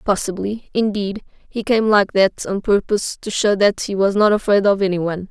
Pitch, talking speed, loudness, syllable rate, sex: 200 Hz, 190 wpm, -18 LUFS, 5.1 syllables/s, female